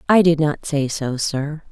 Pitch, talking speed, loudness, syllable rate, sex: 150 Hz, 210 wpm, -19 LUFS, 4.2 syllables/s, female